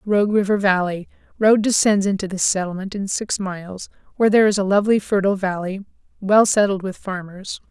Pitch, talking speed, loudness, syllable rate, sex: 195 Hz, 165 wpm, -19 LUFS, 5.9 syllables/s, female